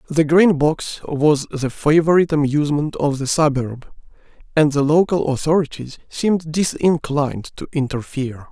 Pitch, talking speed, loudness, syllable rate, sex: 150 Hz, 125 wpm, -18 LUFS, 4.9 syllables/s, male